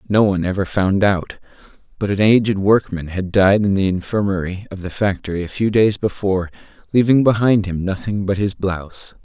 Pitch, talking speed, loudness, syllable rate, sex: 100 Hz, 180 wpm, -18 LUFS, 5.4 syllables/s, male